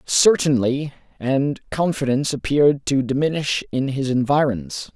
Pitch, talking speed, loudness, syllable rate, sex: 135 Hz, 110 wpm, -20 LUFS, 4.6 syllables/s, male